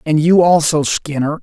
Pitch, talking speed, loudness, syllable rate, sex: 155 Hz, 170 wpm, -13 LUFS, 4.6 syllables/s, male